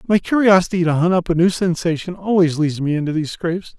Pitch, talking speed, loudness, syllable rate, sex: 175 Hz, 220 wpm, -17 LUFS, 6.4 syllables/s, male